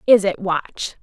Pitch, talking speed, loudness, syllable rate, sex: 195 Hz, 175 wpm, -20 LUFS, 3.6 syllables/s, female